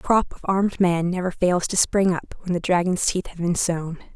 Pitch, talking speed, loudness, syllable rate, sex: 180 Hz, 245 wpm, -22 LUFS, 5.2 syllables/s, female